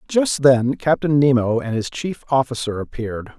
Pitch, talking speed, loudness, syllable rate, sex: 130 Hz, 160 wpm, -19 LUFS, 4.7 syllables/s, male